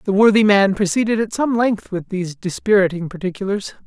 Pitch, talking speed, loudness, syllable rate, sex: 200 Hz, 170 wpm, -18 LUFS, 5.8 syllables/s, male